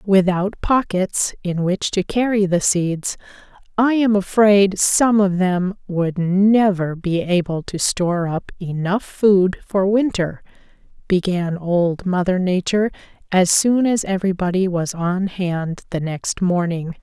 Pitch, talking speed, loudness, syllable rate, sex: 185 Hz, 135 wpm, -19 LUFS, 3.9 syllables/s, female